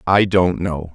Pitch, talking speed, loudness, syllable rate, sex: 90 Hz, 190 wpm, -17 LUFS, 3.7 syllables/s, male